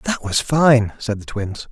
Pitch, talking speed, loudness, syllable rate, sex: 120 Hz, 210 wpm, -18 LUFS, 3.9 syllables/s, male